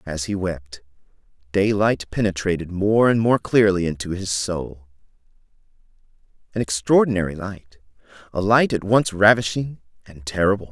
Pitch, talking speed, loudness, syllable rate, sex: 95 Hz, 125 wpm, -20 LUFS, 4.8 syllables/s, male